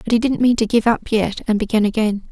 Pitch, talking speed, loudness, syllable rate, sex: 220 Hz, 285 wpm, -18 LUFS, 5.9 syllables/s, female